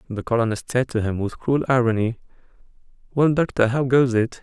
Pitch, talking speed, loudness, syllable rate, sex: 120 Hz, 175 wpm, -21 LUFS, 5.4 syllables/s, male